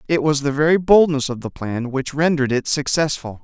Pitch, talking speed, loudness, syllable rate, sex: 145 Hz, 210 wpm, -18 LUFS, 5.5 syllables/s, male